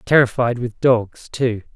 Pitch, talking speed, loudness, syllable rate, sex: 120 Hz, 135 wpm, -19 LUFS, 3.9 syllables/s, male